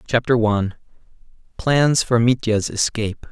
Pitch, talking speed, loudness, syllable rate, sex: 120 Hz, 110 wpm, -19 LUFS, 4.7 syllables/s, male